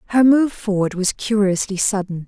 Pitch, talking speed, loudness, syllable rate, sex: 205 Hz, 160 wpm, -18 LUFS, 5.0 syllables/s, female